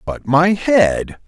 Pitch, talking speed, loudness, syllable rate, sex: 155 Hz, 140 wpm, -15 LUFS, 2.7 syllables/s, male